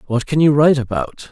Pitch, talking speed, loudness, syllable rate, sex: 135 Hz, 230 wpm, -16 LUFS, 6.1 syllables/s, male